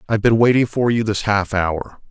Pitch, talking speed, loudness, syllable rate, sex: 105 Hz, 230 wpm, -18 LUFS, 5.4 syllables/s, male